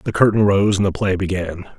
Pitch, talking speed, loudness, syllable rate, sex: 95 Hz, 235 wpm, -17 LUFS, 5.8 syllables/s, male